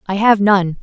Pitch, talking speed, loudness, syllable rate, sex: 200 Hz, 220 wpm, -13 LUFS, 4.5 syllables/s, female